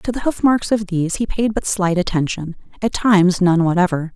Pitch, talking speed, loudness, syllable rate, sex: 195 Hz, 215 wpm, -18 LUFS, 5.4 syllables/s, female